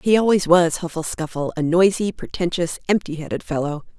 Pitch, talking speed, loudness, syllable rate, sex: 170 Hz, 165 wpm, -20 LUFS, 5.5 syllables/s, female